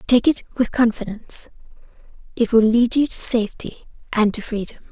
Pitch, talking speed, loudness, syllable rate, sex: 230 Hz, 145 wpm, -19 LUFS, 5.4 syllables/s, female